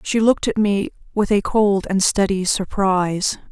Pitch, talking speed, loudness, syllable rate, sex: 200 Hz, 170 wpm, -19 LUFS, 4.6 syllables/s, female